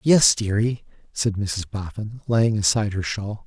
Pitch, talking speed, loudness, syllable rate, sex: 105 Hz, 155 wpm, -22 LUFS, 4.3 syllables/s, male